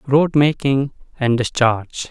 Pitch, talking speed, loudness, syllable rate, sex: 130 Hz, 115 wpm, -18 LUFS, 4.0 syllables/s, male